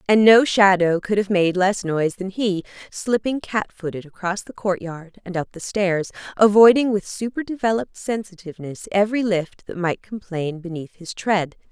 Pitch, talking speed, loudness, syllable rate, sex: 195 Hz, 170 wpm, -20 LUFS, 5.0 syllables/s, female